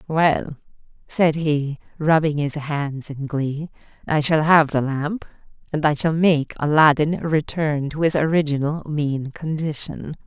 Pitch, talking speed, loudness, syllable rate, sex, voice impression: 150 Hz, 140 wpm, -21 LUFS, 3.9 syllables/s, female, feminine, slightly adult-like, slightly middle-aged, slightly thin, slightly relaxed, slightly weak, bright, slightly soft, clear, fluent, slightly cute, slightly cool, intellectual, slightly refreshing, sincere, calm, very friendly, elegant, slightly sweet, lively, modest